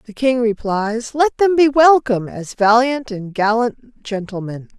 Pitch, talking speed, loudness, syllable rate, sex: 235 Hz, 150 wpm, -17 LUFS, 4.2 syllables/s, female